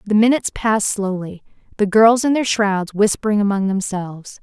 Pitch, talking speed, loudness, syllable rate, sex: 205 Hz, 165 wpm, -17 LUFS, 5.4 syllables/s, female